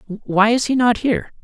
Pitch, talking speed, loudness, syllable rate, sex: 215 Hz, 210 wpm, -17 LUFS, 5.0 syllables/s, male